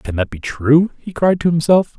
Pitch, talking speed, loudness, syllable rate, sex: 150 Hz, 270 wpm, -16 LUFS, 5.3 syllables/s, male